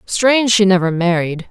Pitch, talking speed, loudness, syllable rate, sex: 195 Hz, 160 wpm, -14 LUFS, 5.0 syllables/s, female